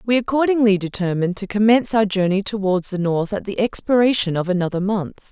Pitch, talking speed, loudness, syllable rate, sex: 200 Hz, 180 wpm, -19 LUFS, 6.0 syllables/s, female